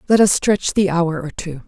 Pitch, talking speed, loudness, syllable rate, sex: 180 Hz, 250 wpm, -17 LUFS, 4.7 syllables/s, female